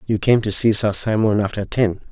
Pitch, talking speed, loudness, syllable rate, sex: 105 Hz, 225 wpm, -18 LUFS, 5.3 syllables/s, male